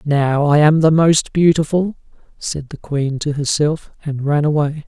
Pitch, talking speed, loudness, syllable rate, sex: 150 Hz, 170 wpm, -16 LUFS, 4.3 syllables/s, male